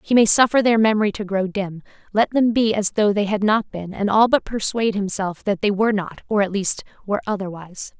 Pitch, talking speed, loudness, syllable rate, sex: 205 Hz, 235 wpm, -20 LUFS, 5.8 syllables/s, female